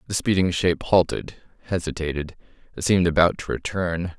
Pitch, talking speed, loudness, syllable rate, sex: 85 Hz, 145 wpm, -23 LUFS, 5.6 syllables/s, male